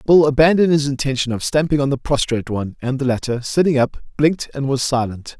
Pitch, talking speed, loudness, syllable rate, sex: 135 Hz, 210 wpm, -18 LUFS, 6.3 syllables/s, male